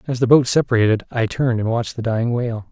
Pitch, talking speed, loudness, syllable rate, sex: 120 Hz, 245 wpm, -18 LUFS, 7.2 syllables/s, male